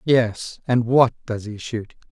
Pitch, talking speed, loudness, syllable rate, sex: 115 Hz, 170 wpm, -21 LUFS, 3.5 syllables/s, male